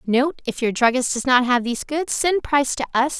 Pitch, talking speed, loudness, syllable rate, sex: 265 Hz, 225 wpm, -20 LUFS, 5.5 syllables/s, female